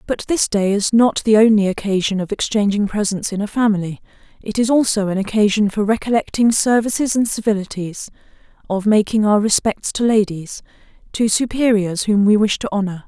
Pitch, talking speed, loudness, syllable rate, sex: 210 Hz, 170 wpm, -17 LUFS, 5.5 syllables/s, female